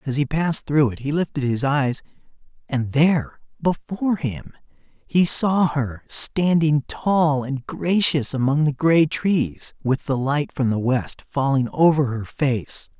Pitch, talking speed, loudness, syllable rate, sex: 145 Hz, 155 wpm, -21 LUFS, 3.9 syllables/s, male